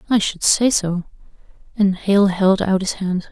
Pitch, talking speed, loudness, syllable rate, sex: 195 Hz, 180 wpm, -18 LUFS, 4.2 syllables/s, female